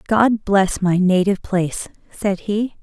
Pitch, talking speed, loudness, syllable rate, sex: 195 Hz, 150 wpm, -18 LUFS, 4.3 syllables/s, female